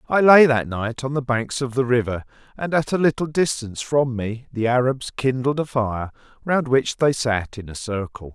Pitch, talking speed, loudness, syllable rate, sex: 125 Hz, 210 wpm, -21 LUFS, 4.8 syllables/s, male